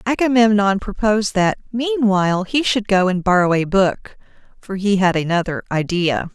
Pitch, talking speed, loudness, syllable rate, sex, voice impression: 200 Hz, 150 wpm, -17 LUFS, 4.8 syllables/s, female, very feminine, slightly young, very thin, tensed, slightly powerful, bright, slightly soft, clear, very cute, intellectual, very refreshing, very sincere, calm, friendly, very reassuring, slightly unique, slightly elegant, wild, sweet, slightly lively, kind, sharp